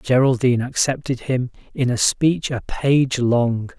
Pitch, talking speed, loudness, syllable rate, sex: 125 Hz, 145 wpm, -19 LUFS, 4.1 syllables/s, male